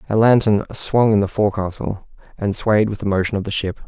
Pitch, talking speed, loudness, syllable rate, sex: 105 Hz, 215 wpm, -19 LUFS, 5.8 syllables/s, male